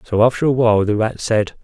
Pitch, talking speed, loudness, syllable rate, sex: 115 Hz, 260 wpm, -16 LUFS, 6.0 syllables/s, male